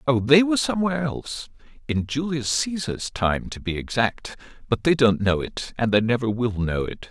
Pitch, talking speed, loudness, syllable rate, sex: 125 Hz, 170 wpm, -23 LUFS, 5.0 syllables/s, male